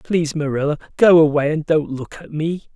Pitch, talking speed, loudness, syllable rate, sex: 155 Hz, 195 wpm, -18 LUFS, 5.5 syllables/s, male